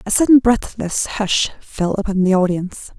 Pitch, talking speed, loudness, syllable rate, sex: 205 Hz, 160 wpm, -17 LUFS, 4.8 syllables/s, female